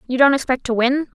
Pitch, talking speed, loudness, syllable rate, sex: 260 Hz, 250 wpm, -18 LUFS, 6.5 syllables/s, female